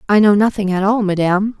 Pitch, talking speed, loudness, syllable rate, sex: 200 Hz, 225 wpm, -15 LUFS, 6.4 syllables/s, female